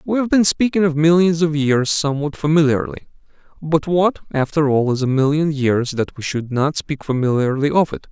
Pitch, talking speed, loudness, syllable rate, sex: 150 Hz, 190 wpm, -18 LUFS, 5.2 syllables/s, male